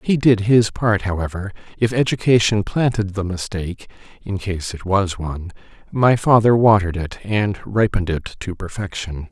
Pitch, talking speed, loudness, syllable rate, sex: 100 Hz, 150 wpm, -19 LUFS, 4.6 syllables/s, male